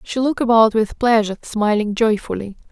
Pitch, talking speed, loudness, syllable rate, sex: 220 Hz, 155 wpm, -18 LUFS, 5.7 syllables/s, female